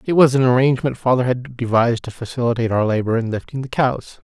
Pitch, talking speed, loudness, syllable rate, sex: 125 Hz, 210 wpm, -18 LUFS, 6.6 syllables/s, male